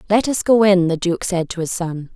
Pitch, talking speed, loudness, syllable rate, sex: 185 Hz, 280 wpm, -18 LUFS, 5.2 syllables/s, female